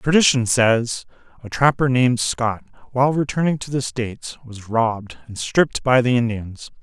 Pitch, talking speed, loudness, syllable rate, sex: 120 Hz, 160 wpm, -19 LUFS, 4.9 syllables/s, male